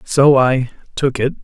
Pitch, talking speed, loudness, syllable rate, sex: 130 Hz, 165 wpm, -15 LUFS, 3.9 syllables/s, male